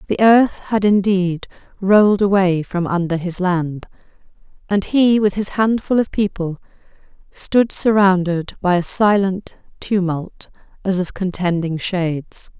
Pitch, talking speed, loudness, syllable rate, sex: 190 Hz, 130 wpm, -17 LUFS, 4.0 syllables/s, female